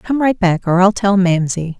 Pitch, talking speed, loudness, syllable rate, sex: 190 Hz, 235 wpm, -14 LUFS, 4.6 syllables/s, female